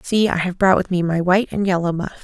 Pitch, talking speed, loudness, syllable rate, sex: 185 Hz, 295 wpm, -18 LUFS, 6.5 syllables/s, female